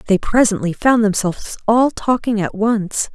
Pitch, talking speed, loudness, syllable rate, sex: 215 Hz, 155 wpm, -17 LUFS, 4.5 syllables/s, female